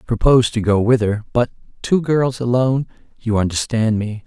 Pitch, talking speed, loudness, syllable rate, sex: 115 Hz, 155 wpm, -18 LUFS, 5.5 syllables/s, male